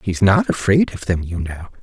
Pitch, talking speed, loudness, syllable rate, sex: 105 Hz, 230 wpm, -18 LUFS, 4.9 syllables/s, male